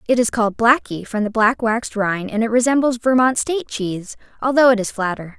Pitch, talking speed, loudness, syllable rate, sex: 230 Hz, 210 wpm, -18 LUFS, 5.9 syllables/s, female